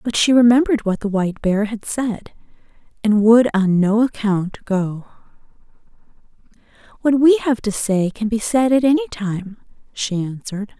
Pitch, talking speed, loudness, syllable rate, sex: 220 Hz, 155 wpm, -18 LUFS, 4.8 syllables/s, female